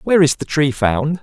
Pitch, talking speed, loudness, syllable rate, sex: 145 Hz, 245 wpm, -16 LUFS, 5.0 syllables/s, male